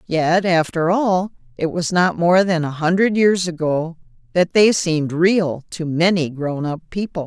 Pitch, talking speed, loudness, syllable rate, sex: 170 Hz, 175 wpm, -18 LUFS, 4.2 syllables/s, female